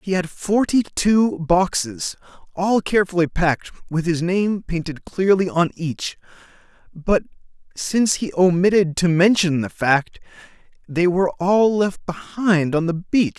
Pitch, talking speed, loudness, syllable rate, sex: 180 Hz, 140 wpm, -19 LUFS, 4.2 syllables/s, male